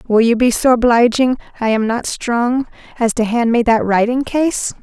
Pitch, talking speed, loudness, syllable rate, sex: 235 Hz, 175 wpm, -15 LUFS, 4.7 syllables/s, female